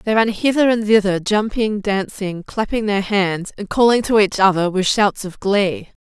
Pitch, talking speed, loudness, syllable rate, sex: 205 Hz, 190 wpm, -17 LUFS, 4.5 syllables/s, female